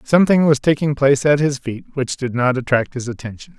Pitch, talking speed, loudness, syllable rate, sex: 135 Hz, 220 wpm, -17 LUFS, 5.9 syllables/s, male